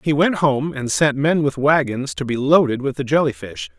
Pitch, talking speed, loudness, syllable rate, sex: 135 Hz, 240 wpm, -18 LUFS, 5.0 syllables/s, male